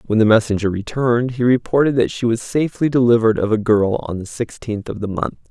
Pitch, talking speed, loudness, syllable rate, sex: 115 Hz, 220 wpm, -18 LUFS, 6.1 syllables/s, male